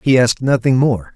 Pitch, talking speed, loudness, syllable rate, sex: 125 Hz, 210 wpm, -15 LUFS, 5.7 syllables/s, male